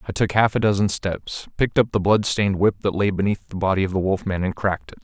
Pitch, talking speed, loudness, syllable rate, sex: 100 Hz, 285 wpm, -21 LUFS, 6.4 syllables/s, male